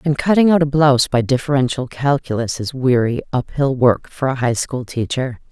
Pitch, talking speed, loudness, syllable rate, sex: 135 Hz, 175 wpm, -17 LUFS, 5.2 syllables/s, female